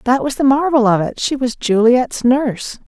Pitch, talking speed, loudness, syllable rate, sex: 250 Hz, 205 wpm, -15 LUFS, 4.6 syllables/s, female